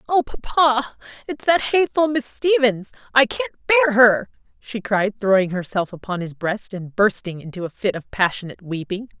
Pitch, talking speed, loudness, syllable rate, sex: 215 Hz, 170 wpm, -20 LUFS, 5.0 syllables/s, female